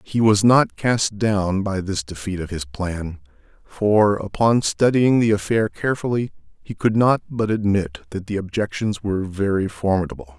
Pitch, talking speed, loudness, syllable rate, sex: 100 Hz, 160 wpm, -20 LUFS, 4.6 syllables/s, male